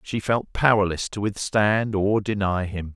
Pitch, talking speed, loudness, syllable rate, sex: 100 Hz, 165 wpm, -23 LUFS, 4.2 syllables/s, male